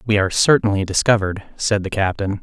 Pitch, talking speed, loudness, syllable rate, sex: 100 Hz, 175 wpm, -18 LUFS, 6.2 syllables/s, male